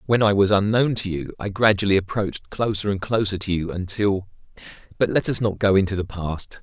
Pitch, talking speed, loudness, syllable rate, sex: 100 Hz, 200 wpm, -22 LUFS, 5.6 syllables/s, male